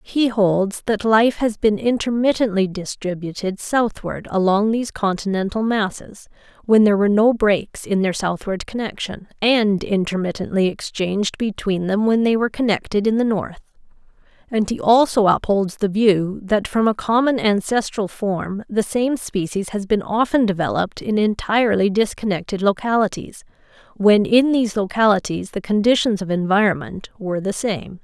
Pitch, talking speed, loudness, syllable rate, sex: 210 Hz, 145 wpm, -19 LUFS, 4.9 syllables/s, female